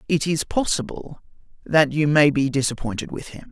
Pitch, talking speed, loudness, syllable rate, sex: 145 Hz, 170 wpm, -21 LUFS, 5.1 syllables/s, male